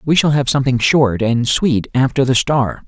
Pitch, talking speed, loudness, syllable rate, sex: 130 Hz, 210 wpm, -15 LUFS, 4.9 syllables/s, male